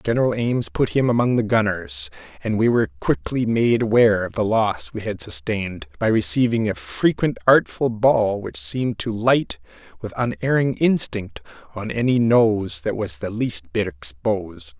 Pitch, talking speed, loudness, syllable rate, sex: 115 Hz, 165 wpm, -21 LUFS, 4.6 syllables/s, male